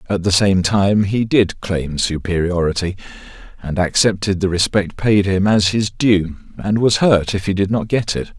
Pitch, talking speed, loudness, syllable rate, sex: 95 Hz, 185 wpm, -17 LUFS, 4.5 syllables/s, male